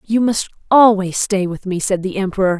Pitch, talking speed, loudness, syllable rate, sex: 195 Hz, 210 wpm, -16 LUFS, 5.4 syllables/s, female